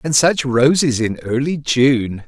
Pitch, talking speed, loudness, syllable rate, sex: 135 Hz, 160 wpm, -16 LUFS, 3.7 syllables/s, male